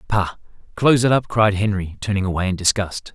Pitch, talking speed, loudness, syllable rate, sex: 100 Hz, 190 wpm, -19 LUFS, 6.1 syllables/s, male